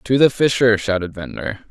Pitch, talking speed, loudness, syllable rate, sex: 115 Hz, 175 wpm, -18 LUFS, 5.7 syllables/s, male